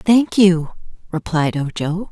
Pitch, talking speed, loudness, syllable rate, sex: 180 Hz, 115 wpm, -18 LUFS, 3.6 syllables/s, female